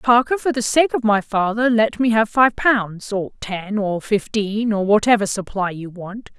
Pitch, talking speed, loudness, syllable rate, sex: 215 Hz, 195 wpm, -19 LUFS, 4.4 syllables/s, female